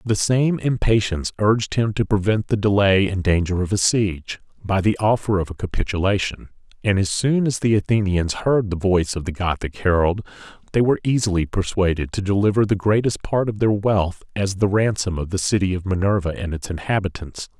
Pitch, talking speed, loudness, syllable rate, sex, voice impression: 100 Hz, 190 wpm, -20 LUFS, 5.6 syllables/s, male, very masculine, very adult-like, slightly thick, slightly muffled, cool, slightly calm, slightly wild